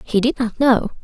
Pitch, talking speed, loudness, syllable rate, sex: 240 Hz, 230 wpm, -18 LUFS, 4.9 syllables/s, female